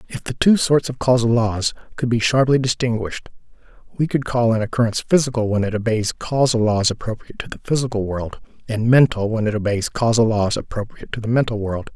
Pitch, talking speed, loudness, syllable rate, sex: 115 Hz, 195 wpm, -19 LUFS, 5.9 syllables/s, male